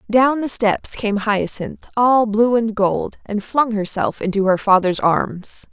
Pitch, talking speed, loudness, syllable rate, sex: 215 Hz, 170 wpm, -18 LUFS, 3.7 syllables/s, female